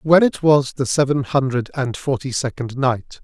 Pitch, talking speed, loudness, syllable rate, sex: 135 Hz, 185 wpm, -19 LUFS, 4.5 syllables/s, male